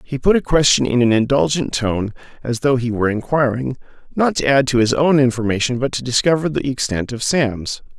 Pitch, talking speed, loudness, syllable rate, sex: 125 Hz, 205 wpm, -17 LUFS, 5.5 syllables/s, male